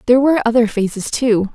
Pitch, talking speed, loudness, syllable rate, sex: 235 Hz, 195 wpm, -15 LUFS, 6.7 syllables/s, female